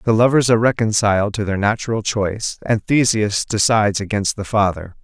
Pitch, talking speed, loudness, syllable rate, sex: 105 Hz, 165 wpm, -17 LUFS, 5.6 syllables/s, male